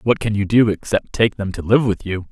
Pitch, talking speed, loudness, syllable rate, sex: 105 Hz, 285 wpm, -18 LUFS, 5.5 syllables/s, male